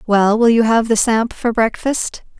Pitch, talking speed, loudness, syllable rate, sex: 225 Hz, 200 wpm, -15 LUFS, 4.2 syllables/s, female